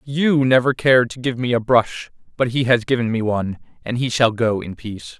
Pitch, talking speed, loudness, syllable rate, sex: 120 Hz, 230 wpm, -18 LUFS, 5.4 syllables/s, male